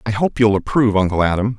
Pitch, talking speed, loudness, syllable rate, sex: 110 Hz, 225 wpm, -16 LUFS, 6.8 syllables/s, male